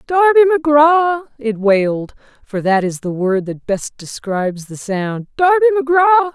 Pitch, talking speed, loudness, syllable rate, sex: 255 Hz, 130 wpm, -15 LUFS, 4.3 syllables/s, female